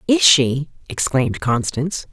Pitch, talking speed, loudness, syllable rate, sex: 145 Hz, 115 wpm, -17 LUFS, 4.6 syllables/s, female